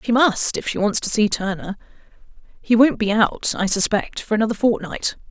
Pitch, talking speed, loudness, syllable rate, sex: 220 Hz, 190 wpm, -19 LUFS, 5.2 syllables/s, female